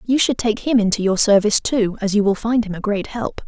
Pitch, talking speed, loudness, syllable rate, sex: 215 Hz, 275 wpm, -18 LUFS, 5.7 syllables/s, female